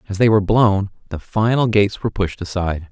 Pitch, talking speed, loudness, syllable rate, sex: 100 Hz, 205 wpm, -18 LUFS, 6.4 syllables/s, male